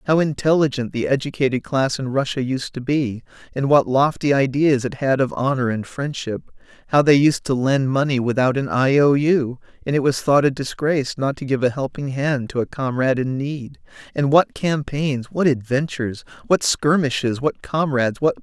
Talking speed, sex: 190 wpm, male